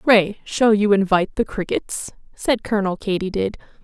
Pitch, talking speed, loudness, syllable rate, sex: 205 Hz, 155 wpm, -20 LUFS, 4.9 syllables/s, female